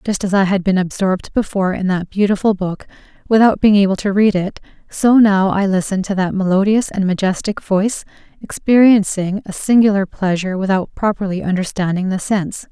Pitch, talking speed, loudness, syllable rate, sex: 195 Hz, 170 wpm, -16 LUFS, 5.6 syllables/s, female